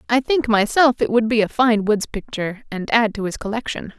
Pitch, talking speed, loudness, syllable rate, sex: 225 Hz, 225 wpm, -19 LUFS, 5.4 syllables/s, female